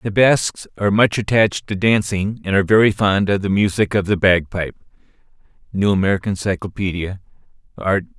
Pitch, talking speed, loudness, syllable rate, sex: 100 Hz, 155 wpm, -18 LUFS, 5.9 syllables/s, male